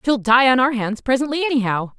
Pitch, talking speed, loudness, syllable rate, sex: 250 Hz, 210 wpm, -17 LUFS, 5.9 syllables/s, female